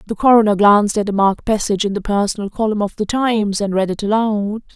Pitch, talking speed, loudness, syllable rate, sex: 210 Hz, 225 wpm, -16 LUFS, 6.5 syllables/s, female